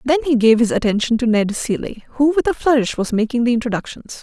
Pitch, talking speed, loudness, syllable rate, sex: 245 Hz, 225 wpm, -17 LUFS, 6.1 syllables/s, female